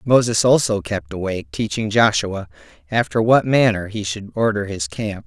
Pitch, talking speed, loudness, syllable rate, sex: 105 Hz, 160 wpm, -19 LUFS, 4.9 syllables/s, male